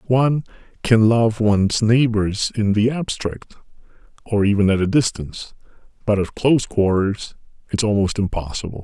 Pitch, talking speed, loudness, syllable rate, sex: 110 Hz, 135 wpm, -19 LUFS, 5.0 syllables/s, male